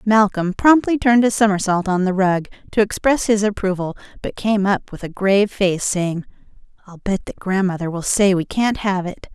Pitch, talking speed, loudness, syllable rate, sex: 195 Hz, 195 wpm, -18 LUFS, 5.1 syllables/s, female